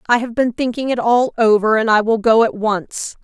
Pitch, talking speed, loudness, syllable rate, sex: 230 Hz, 240 wpm, -16 LUFS, 5.0 syllables/s, female